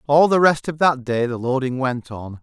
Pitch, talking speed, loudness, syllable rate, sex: 135 Hz, 245 wpm, -19 LUFS, 4.8 syllables/s, male